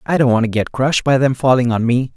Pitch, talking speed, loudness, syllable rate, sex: 125 Hz, 305 wpm, -15 LUFS, 6.4 syllables/s, male